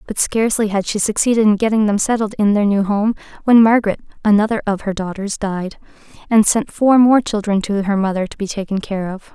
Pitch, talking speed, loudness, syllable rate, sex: 210 Hz, 210 wpm, -16 LUFS, 5.8 syllables/s, female